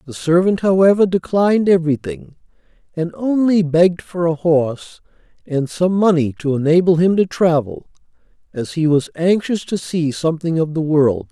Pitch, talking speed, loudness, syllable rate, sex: 170 Hz, 155 wpm, -16 LUFS, 5.0 syllables/s, male